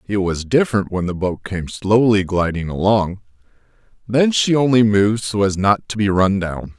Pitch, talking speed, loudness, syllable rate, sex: 105 Hz, 185 wpm, -17 LUFS, 4.8 syllables/s, male